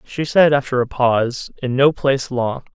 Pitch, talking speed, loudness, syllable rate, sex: 130 Hz, 195 wpm, -18 LUFS, 4.8 syllables/s, male